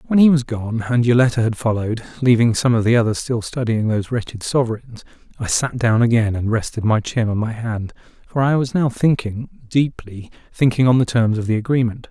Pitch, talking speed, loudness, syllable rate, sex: 120 Hz, 205 wpm, -18 LUFS, 5.7 syllables/s, male